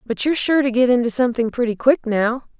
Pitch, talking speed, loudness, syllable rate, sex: 245 Hz, 230 wpm, -18 LUFS, 6.4 syllables/s, female